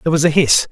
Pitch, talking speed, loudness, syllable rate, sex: 155 Hz, 335 wpm, -14 LUFS, 8.3 syllables/s, male